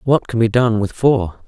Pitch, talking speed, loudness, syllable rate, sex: 115 Hz, 245 wpm, -16 LUFS, 4.6 syllables/s, male